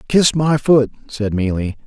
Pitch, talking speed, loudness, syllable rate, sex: 125 Hz, 160 wpm, -17 LUFS, 4.1 syllables/s, male